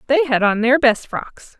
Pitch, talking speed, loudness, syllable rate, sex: 250 Hz, 225 wpm, -16 LUFS, 4.6 syllables/s, female